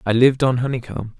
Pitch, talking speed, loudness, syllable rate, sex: 125 Hz, 200 wpm, -18 LUFS, 6.6 syllables/s, male